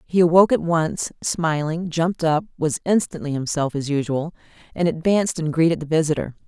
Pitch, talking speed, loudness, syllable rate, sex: 160 Hz, 165 wpm, -21 LUFS, 5.5 syllables/s, female